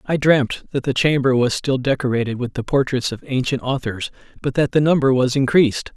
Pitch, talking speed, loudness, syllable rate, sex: 130 Hz, 200 wpm, -19 LUFS, 5.5 syllables/s, male